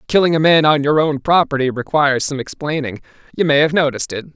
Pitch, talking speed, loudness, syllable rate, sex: 145 Hz, 195 wpm, -16 LUFS, 6.4 syllables/s, male